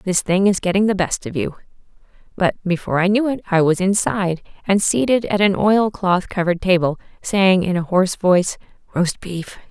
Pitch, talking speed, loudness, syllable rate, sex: 190 Hz, 185 wpm, -18 LUFS, 5.4 syllables/s, female